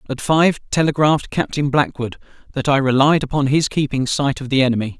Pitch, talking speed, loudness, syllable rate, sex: 140 Hz, 180 wpm, -18 LUFS, 5.6 syllables/s, male